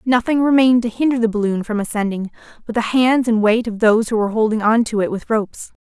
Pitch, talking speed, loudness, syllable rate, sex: 225 Hz, 235 wpm, -17 LUFS, 6.4 syllables/s, female